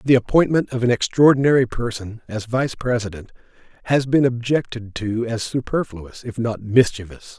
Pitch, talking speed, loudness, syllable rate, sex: 120 Hz, 145 wpm, -20 LUFS, 5.0 syllables/s, male